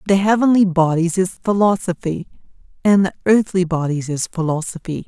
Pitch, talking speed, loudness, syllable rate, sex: 180 Hz, 130 wpm, -18 LUFS, 5.2 syllables/s, female